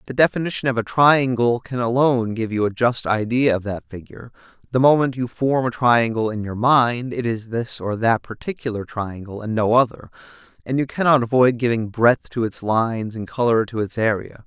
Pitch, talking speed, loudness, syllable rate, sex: 120 Hz, 200 wpm, -20 LUFS, 5.3 syllables/s, male